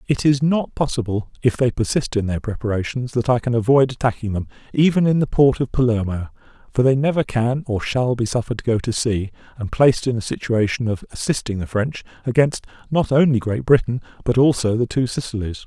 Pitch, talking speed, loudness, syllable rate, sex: 120 Hz, 205 wpm, -20 LUFS, 5.8 syllables/s, male